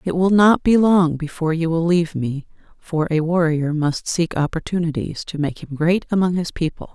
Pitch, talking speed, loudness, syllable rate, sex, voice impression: 165 Hz, 200 wpm, -19 LUFS, 5.2 syllables/s, female, feminine, adult-like, tensed, hard, clear, fluent, intellectual, calm, reassuring, elegant, lively, slightly strict, slightly sharp